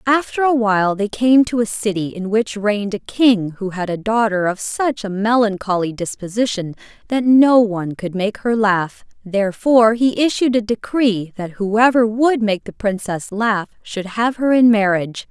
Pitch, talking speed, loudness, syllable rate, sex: 215 Hz, 175 wpm, -17 LUFS, 4.6 syllables/s, female